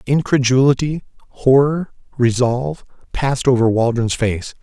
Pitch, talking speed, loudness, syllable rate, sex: 130 Hz, 90 wpm, -17 LUFS, 4.9 syllables/s, male